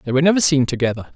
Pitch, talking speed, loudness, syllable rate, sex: 140 Hz, 260 wpm, -17 LUFS, 8.1 syllables/s, male